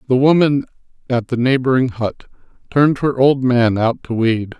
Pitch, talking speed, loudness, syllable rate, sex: 125 Hz, 170 wpm, -16 LUFS, 4.8 syllables/s, male